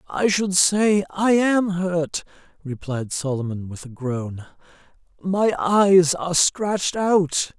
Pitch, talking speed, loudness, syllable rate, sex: 170 Hz, 125 wpm, -20 LUFS, 3.4 syllables/s, male